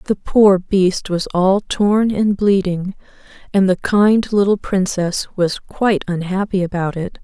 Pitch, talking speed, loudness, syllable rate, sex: 190 Hz, 150 wpm, -17 LUFS, 3.8 syllables/s, female